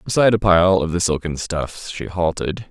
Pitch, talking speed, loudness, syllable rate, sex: 90 Hz, 200 wpm, -19 LUFS, 5.0 syllables/s, male